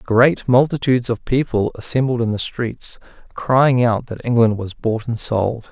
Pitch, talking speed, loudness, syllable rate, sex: 120 Hz, 170 wpm, -18 LUFS, 4.3 syllables/s, male